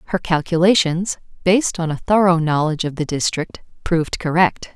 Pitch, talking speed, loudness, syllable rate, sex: 170 Hz, 150 wpm, -18 LUFS, 5.5 syllables/s, female